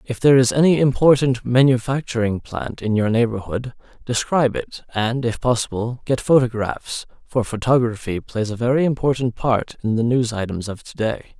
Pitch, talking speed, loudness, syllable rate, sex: 120 Hz, 165 wpm, -20 LUFS, 5.1 syllables/s, male